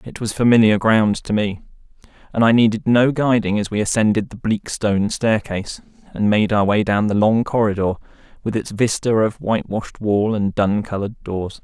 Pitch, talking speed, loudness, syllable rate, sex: 105 Hz, 185 wpm, -18 LUFS, 5.3 syllables/s, male